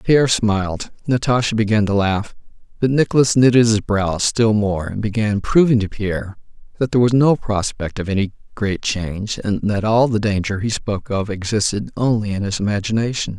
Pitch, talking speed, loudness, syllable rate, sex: 105 Hz, 180 wpm, -18 LUFS, 5.4 syllables/s, male